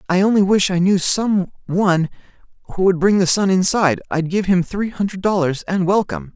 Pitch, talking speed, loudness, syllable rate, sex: 185 Hz, 200 wpm, -17 LUFS, 5.5 syllables/s, male